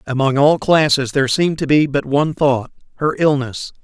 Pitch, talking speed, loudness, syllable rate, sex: 140 Hz, 170 wpm, -16 LUFS, 5.4 syllables/s, male